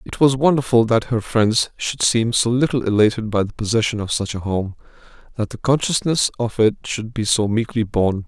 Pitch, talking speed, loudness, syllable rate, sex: 115 Hz, 205 wpm, -19 LUFS, 5.3 syllables/s, male